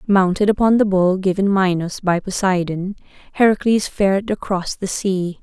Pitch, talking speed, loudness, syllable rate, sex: 190 Hz, 145 wpm, -18 LUFS, 4.8 syllables/s, female